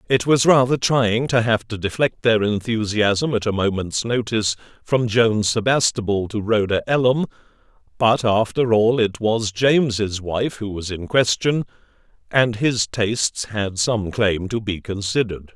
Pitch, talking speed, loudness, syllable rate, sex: 110 Hz, 155 wpm, -20 LUFS, 4.3 syllables/s, male